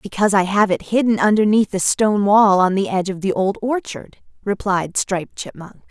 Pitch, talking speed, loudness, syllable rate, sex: 200 Hz, 195 wpm, -17 LUFS, 5.4 syllables/s, female